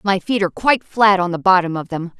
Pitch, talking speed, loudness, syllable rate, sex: 190 Hz, 275 wpm, -17 LUFS, 6.3 syllables/s, female